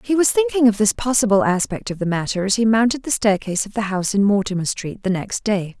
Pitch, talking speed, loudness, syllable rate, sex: 210 Hz, 250 wpm, -19 LUFS, 6.2 syllables/s, female